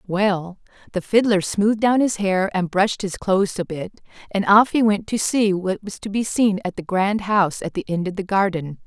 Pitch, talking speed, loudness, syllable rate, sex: 195 Hz, 230 wpm, -20 LUFS, 5.1 syllables/s, female